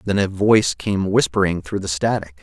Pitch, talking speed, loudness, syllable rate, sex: 100 Hz, 200 wpm, -19 LUFS, 5.3 syllables/s, male